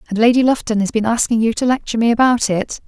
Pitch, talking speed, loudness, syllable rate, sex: 230 Hz, 250 wpm, -16 LUFS, 6.8 syllables/s, female